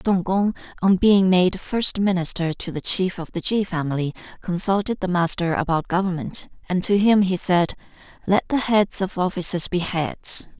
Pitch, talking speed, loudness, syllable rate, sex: 185 Hz, 175 wpm, -21 LUFS, 4.7 syllables/s, female